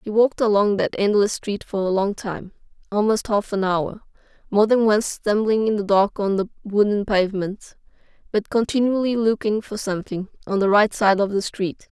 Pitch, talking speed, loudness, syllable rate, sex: 205 Hz, 185 wpm, -21 LUFS, 5.0 syllables/s, female